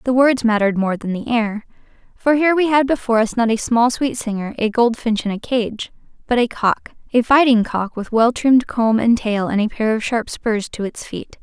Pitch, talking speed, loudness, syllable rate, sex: 230 Hz, 225 wpm, -18 LUFS, 5.3 syllables/s, female